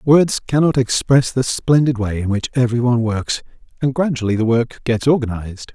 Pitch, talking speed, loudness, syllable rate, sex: 125 Hz, 165 wpm, -17 LUFS, 5.1 syllables/s, male